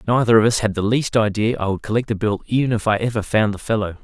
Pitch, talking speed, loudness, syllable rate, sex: 110 Hz, 285 wpm, -19 LUFS, 6.6 syllables/s, male